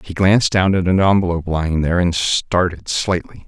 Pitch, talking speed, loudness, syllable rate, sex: 90 Hz, 190 wpm, -17 LUFS, 5.6 syllables/s, male